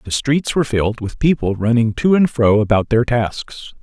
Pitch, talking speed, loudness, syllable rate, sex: 120 Hz, 205 wpm, -16 LUFS, 4.9 syllables/s, male